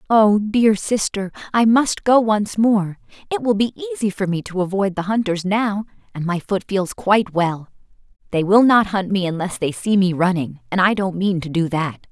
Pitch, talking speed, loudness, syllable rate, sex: 195 Hz, 210 wpm, -19 LUFS, 4.9 syllables/s, female